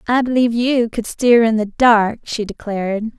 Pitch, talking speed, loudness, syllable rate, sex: 225 Hz, 190 wpm, -16 LUFS, 4.8 syllables/s, female